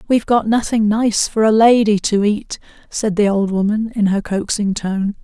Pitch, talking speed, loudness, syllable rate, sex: 210 Hz, 195 wpm, -16 LUFS, 4.9 syllables/s, female